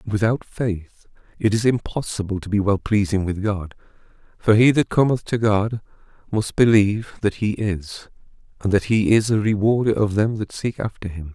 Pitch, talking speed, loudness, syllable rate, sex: 105 Hz, 185 wpm, -21 LUFS, 5.0 syllables/s, male